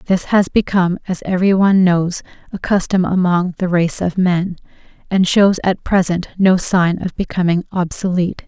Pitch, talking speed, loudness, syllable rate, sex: 180 Hz, 165 wpm, -16 LUFS, 4.9 syllables/s, female